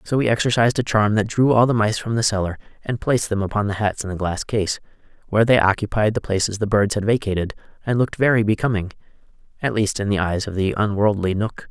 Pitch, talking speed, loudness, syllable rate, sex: 105 Hz, 225 wpm, -20 LUFS, 6.4 syllables/s, male